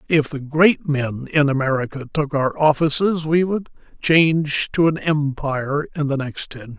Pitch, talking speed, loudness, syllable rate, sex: 145 Hz, 175 wpm, -19 LUFS, 4.6 syllables/s, male